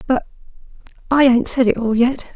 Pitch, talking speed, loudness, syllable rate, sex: 245 Hz, 180 wpm, -16 LUFS, 5.6 syllables/s, female